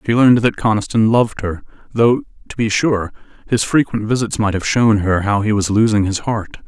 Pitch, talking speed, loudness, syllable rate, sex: 110 Hz, 205 wpm, -16 LUFS, 5.3 syllables/s, male